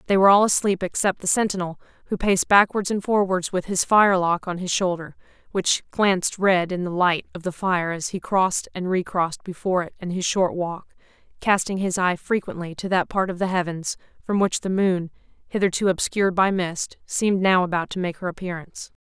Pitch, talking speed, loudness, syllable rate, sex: 185 Hz, 200 wpm, -22 LUFS, 5.6 syllables/s, female